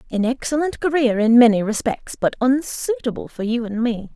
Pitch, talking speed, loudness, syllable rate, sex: 245 Hz, 175 wpm, -19 LUFS, 5.2 syllables/s, female